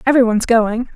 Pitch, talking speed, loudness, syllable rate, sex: 235 Hz, 190 wpm, -15 LUFS, 7.5 syllables/s, female